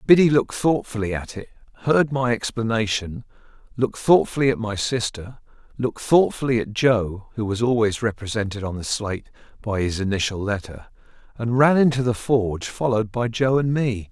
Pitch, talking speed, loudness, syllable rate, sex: 115 Hz, 160 wpm, -22 LUFS, 4.4 syllables/s, male